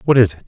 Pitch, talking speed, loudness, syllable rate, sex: 110 Hz, 375 wpm, -15 LUFS, 8.6 syllables/s, male